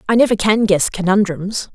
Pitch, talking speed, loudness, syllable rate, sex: 200 Hz, 170 wpm, -16 LUFS, 5.1 syllables/s, female